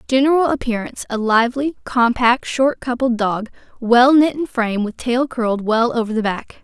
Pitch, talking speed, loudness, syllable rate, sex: 245 Hz, 165 wpm, -17 LUFS, 5.2 syllables/s, female